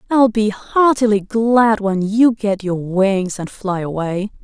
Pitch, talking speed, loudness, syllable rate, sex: 210 Hz, 160 wpm, -16 LUFS, 3.6 syllables/s, female